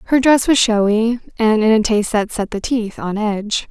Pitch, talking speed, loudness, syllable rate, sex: 220 Hz, 225 wpm, -16 LUFS, 4.9 syllables/s, female